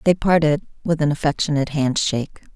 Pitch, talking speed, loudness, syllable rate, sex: 155 Hz, 140 wpm, -20 LUFS, 5.9 syllables/s, female